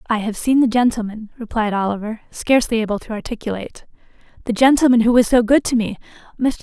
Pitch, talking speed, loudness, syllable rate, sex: 230 Hz, 170 wpm, -18 LUFS, 6.5 syllables/s, female